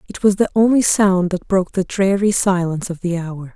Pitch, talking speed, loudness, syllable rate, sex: 185 Hz, 220 wpm, -17 LUFS, 5.4 syllables/s, female